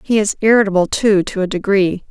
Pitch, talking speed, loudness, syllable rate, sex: 200 Hz, 200 wpm, -15 LUFS, 5.6 syllables/s, female